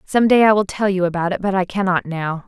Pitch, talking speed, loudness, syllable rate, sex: 190 Hz, 290 wpm, -18 LUFS, 5.9 syllables/s, female